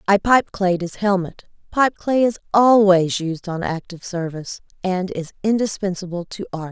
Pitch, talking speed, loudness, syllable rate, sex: 190 Hz, 135 wpm, -20 LUFS, 5.2 syllables/s, female